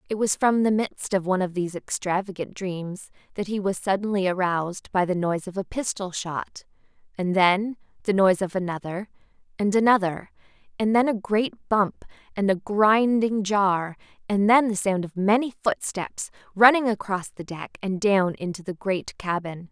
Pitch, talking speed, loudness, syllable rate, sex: 195 Hz, 175 wpm, -24 LUFS, 4.8 syllables/s, female